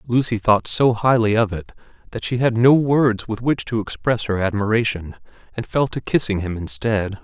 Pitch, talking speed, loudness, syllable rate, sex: 110 Hz, 190 wpm, -19 LUFS, 4.9 syllables/s, male